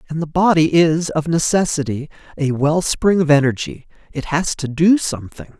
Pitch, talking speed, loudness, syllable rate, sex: 155 Hz, 160 wpm, -17 LUFS, 5.0 syllables/s, male